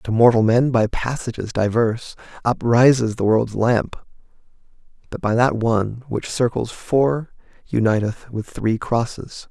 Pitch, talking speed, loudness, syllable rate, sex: 115 Hz, 135 wpm, -20 LUFS, 4.2 syllables/s, male